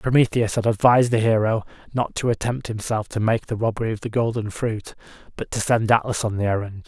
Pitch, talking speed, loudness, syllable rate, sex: 110 Hz, 210 wpm, -22 LUFS, 5.9 syllables/s, male